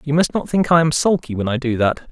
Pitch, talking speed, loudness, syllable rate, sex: 145 Hz, 310 wpm, -18 LUFS, 6.0 syllables/s, male